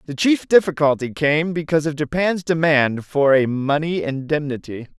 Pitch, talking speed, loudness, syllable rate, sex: 150 Hz, 145 wpm, -19 LUFS, 4.8 syllables/s, male